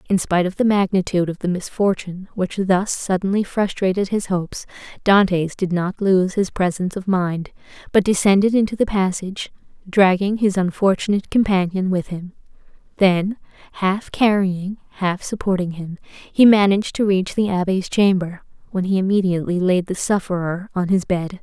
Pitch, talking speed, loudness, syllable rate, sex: 190 Hz, 155 wpm, -19 LUFS, 5.2 syllables/s, female